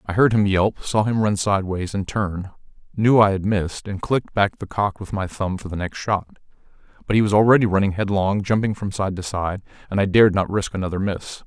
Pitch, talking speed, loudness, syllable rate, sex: 100 Hz, 230 wpm, -21 LUFS, 5.7 syllables/s, male